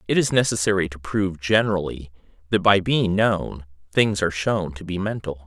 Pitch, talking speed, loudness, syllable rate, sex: 95 Hz, 175 wpm, -22 LUFS, 5.4 syllables/s, male